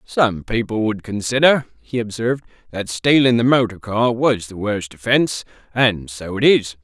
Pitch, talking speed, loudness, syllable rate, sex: 115 Hz, 165 wpm, -18 LUFS, 4.7 syllables/s, male